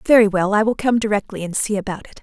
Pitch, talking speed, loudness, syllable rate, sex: 210 Hz, 270 wpm, -18 LUFS, 6.6 syllables/s, female